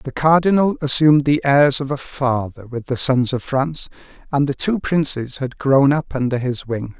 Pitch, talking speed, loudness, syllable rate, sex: 140 Hz, 195 wpm, -18 LUFS, 4.8 syllables/s, male